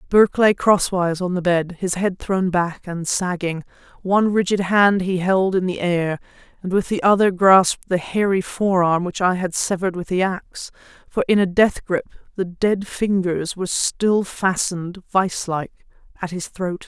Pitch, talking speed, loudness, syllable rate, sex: 185 Hz, 180 wpm, -20 LUFS, 4.6 syllables/s, female